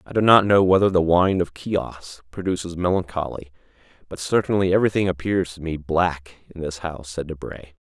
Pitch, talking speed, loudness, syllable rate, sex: 85 Hz, 175 wpm, -21 LUFS, 5.5 syllables/s, male